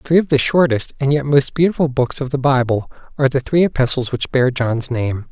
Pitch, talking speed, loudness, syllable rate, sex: 135 Hz, 225 wpm, -17 LUFS, 5.5 syllables/s, male